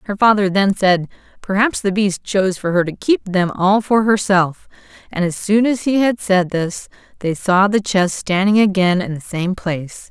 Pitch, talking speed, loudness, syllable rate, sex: 195 Hz, 200 wpm, -17 LUFS, 4.6 syllables/s, female